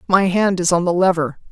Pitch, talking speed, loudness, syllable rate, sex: 180 Hz, 240 wpm, -17 LUFS, 5.7 syllables/s, female